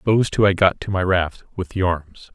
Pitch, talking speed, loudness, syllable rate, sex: 95 Hz, 255 wpm, -20 LUFS, 5.3 syllables/s, male